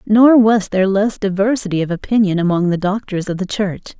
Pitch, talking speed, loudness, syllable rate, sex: 200 Hz, 195 wpm, -16 LUFS, 5.7 syllables/s, female